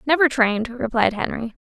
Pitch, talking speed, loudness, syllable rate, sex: 245 Hz, 150 wpm, -20 LUFS, 5.5 syllables/s, female